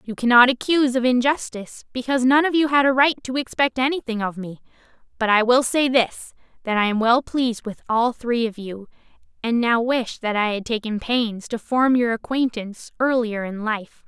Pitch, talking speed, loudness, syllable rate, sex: 240 Hz, 200 wpm, -20 LUFS, 5.2 syllables/s, female